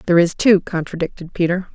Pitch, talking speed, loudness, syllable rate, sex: 175 Hz, 170 wpm, -18 LUFS, 6.4 syllables/s, female